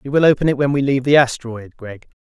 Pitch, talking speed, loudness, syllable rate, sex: 130 Hz, 265 wpm, -16 LUFS, 7.0 syllables/s, male